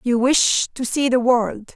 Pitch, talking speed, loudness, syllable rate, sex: 245 Hz, 205 wpm, -18 LUFS, 3.6 syllables/s, female